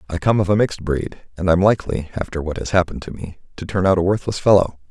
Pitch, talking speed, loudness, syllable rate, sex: 90 Hz, 255 wpm, -19 LUFS, 6.7 syllables/s, male